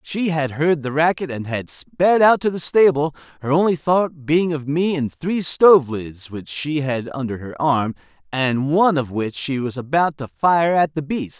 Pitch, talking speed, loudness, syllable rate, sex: 150 Hz, 210 wpm, -19 LUFS, 4.4 syllables/s, male